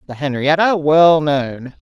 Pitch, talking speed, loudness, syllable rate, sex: 150 Hz, 130 wpm, -14 LUFS, 3.8 syllables/s, female